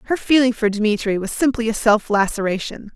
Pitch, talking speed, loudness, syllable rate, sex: 225 Hz, 185 wpm, -18 LUFS, 5.5 syllables/s, female